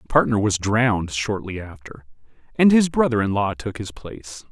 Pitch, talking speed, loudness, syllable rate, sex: 110 Hz, 185 wpm, -20 LUFS, 5.2 syllables/s, male